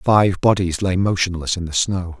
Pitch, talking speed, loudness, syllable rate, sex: 95 Hz, 190 wpm, -19 LUFS, 4.7 syllables/s, male